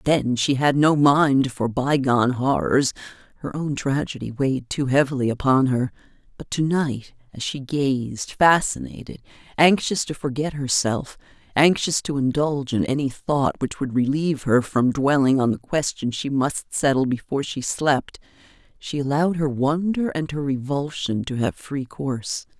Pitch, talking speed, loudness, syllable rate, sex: 135 Hz, 155 wpm, -22 LUFS, 4.6 syllables/s, female